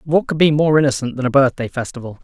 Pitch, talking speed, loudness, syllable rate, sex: 140 Hz, 240 wpm, -16 LUFS, 6.7 syllables/s, male